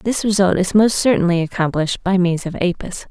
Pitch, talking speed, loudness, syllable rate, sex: 185 Hz, 195 wpm, -17 LUFS, 5.6 syllables/s, female